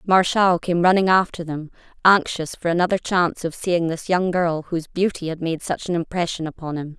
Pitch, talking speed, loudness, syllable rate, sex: 175 Hz, 200 wpm, -21 LUFS, 5.4 syllables/s, female